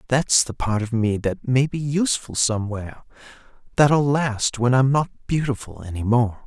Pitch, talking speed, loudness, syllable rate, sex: 125 Hz, 165 wpm, -21 LUFS, 4.9 syllables/s, male